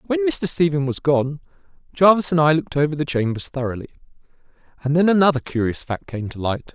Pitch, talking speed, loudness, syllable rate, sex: 155 Hz, 185 wpm, -20 LUFS, 5.9 syllables/s, male